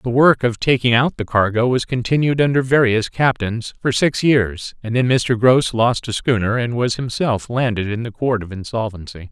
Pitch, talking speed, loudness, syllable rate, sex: 120 Hz, 200 wpm, -18 LUFS, 4.9 syllables/s, male